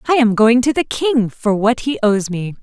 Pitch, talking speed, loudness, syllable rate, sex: 235 Hz, 250 wpm, -16 LUFS, 4.6 syllables/s, female